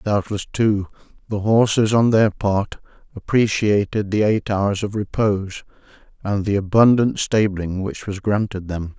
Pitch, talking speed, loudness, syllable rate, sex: 100 Hz, 140 wpm, -19 LUFS, 4.3 syllables/s, male